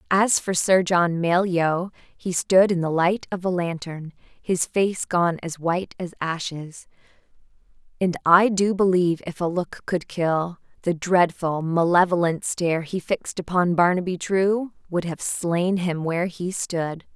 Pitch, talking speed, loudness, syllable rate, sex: 175 Hz, 155 wpm, -22 LUFS, 4.1 syllables/s, female